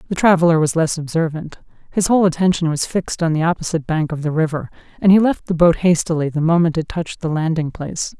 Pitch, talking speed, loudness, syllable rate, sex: 165 Hz, 220 wpm, -18 LUFS, 6.5 syllables/s, female